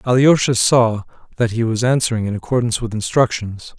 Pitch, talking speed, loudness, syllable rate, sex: 115 Hz, 160 wpm, -17 LUFS, 5.7 syllables/s, male